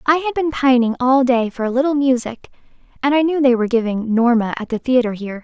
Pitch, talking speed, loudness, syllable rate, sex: 250 Hz, 230 wpm, -17 LUFS, 6.2 syllables/s, female